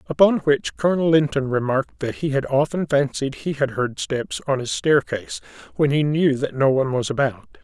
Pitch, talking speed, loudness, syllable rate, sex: 140 Hz, 195 wpm, -21 LUFS, 5.4 syllables/s, male